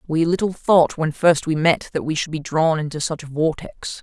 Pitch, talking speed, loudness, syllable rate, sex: 160 Hz, 240 wpm, -20 LUFS, 5.0 syllables/s, female